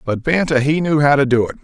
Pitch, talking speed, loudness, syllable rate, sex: 140 Hz, 295 wpm, -15 LUFS, 6.1 syllables/s, male